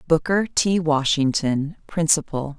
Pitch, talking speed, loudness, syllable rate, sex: 155 Hz, 95 wpm, -21 LUFS, 3.8 syllables/s, female